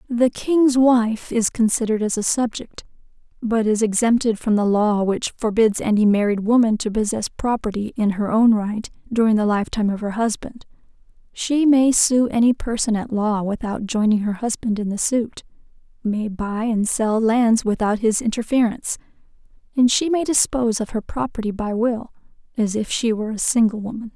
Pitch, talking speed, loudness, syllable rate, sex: 225 Hz, 175 wpm, -20 LUFS, 5.1 syllables/s, female